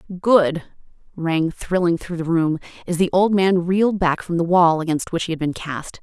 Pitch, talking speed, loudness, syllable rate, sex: 175 Hz, 210 wpm, -20 LUFS, 4.9 syllables/s, female